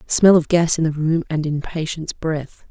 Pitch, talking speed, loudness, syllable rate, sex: 160 Hz, 220 wpm, -19 LUFS, 4.3 syllables/s, female